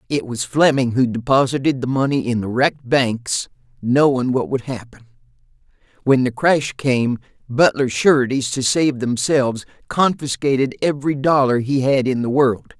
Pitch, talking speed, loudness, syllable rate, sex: 130 Hz, 150 wpm, -18 LUFS, 4.8 syllables/s, male